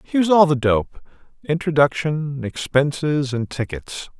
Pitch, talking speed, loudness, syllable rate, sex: 145 Hz, 100 wpm, -20 LUFS, 4.4 syllables/s, male